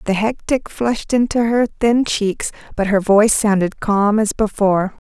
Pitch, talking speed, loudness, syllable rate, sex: 215 Hz, 165 wpm, -17 LUFS, 4.7 syllables/s, female